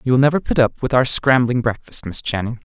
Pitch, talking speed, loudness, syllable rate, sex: 120 Hz, 245 wpm, -18 LUFS, 5.9 syllables/s, male